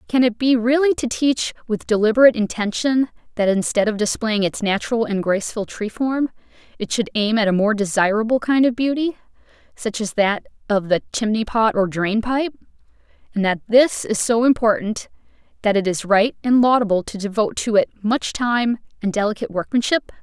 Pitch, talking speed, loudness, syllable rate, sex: 225 Hz, 180 wpm, -19 LUFS, 5.4 syllables/s, female